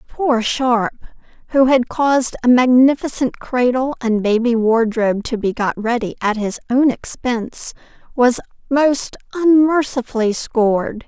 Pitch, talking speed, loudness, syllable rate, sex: 245 Hz, 125 wpm, -17 LUFS, 4.3 syllables/s, female